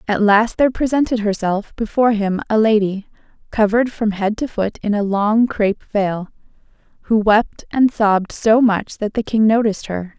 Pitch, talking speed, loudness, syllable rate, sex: 215 Hz, 175 wpm, -17 LUFS, 5.0 syllables/s, female